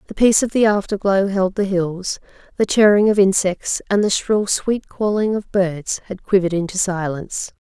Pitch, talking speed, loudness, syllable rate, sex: 195 Hz, 190 wpm, -18 LUFS, 5.0 syllables/s, female